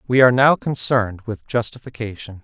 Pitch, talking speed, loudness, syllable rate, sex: 115 Hz, 150 wpm, -19 LUFS, 5.7 syllables/s, male